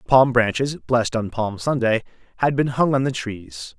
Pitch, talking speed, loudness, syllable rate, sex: 120 Hz, 190 wpm, -21 LUFS, 4.7 syllables/s, male